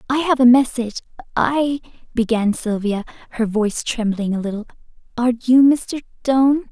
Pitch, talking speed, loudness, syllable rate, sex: 240 Hz, 145 wpm, -18 LUFS, 5.4 syllables/s, female